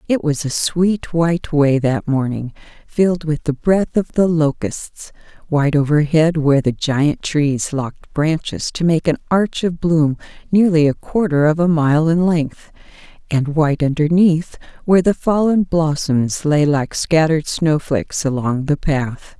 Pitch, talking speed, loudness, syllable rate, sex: 155 Hz, 160 wpm, -17 LUFS, 4.3 syllables/s, female